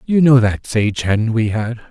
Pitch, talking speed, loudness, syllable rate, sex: 115 Hz, 220 wpm, -16 LUFS, 4.1 syllables/s, male